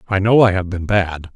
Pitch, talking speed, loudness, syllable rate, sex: 95 Hz, 265 wpm, -16 LUFS, 5.2 syllables/s, male